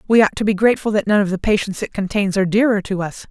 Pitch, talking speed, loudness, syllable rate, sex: 205 Hz, 290 wpm, -18 LUFS, 7.1 syllables/s, female